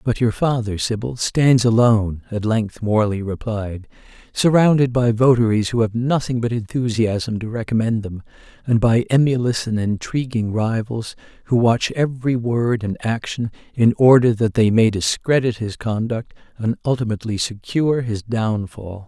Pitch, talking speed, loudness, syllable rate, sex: 115 Hz, 145 wpm, -19 LUFS, 4.7 syllables/s, male